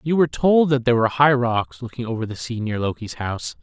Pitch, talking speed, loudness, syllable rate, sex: 120 Hz, 250 wpm, -20 LUFS, 6.3 syllables/s, male